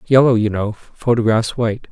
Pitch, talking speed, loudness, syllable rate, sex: 115 Hz, 155 wpm, -17 LUFS, 5.1 syllables/s, male